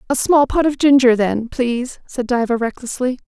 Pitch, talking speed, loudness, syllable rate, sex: 250 Hz, 185 wpm, -17 LUFS, 5.0 syllables/s, female